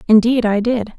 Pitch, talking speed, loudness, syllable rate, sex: 225 Hz, 180 wpm, -15 LUFS, 5.0 syllables/s, female